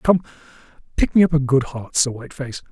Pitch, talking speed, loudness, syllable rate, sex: 135 Hz, 220 wpm, -20 LUFS, 5.9 syllables/s, male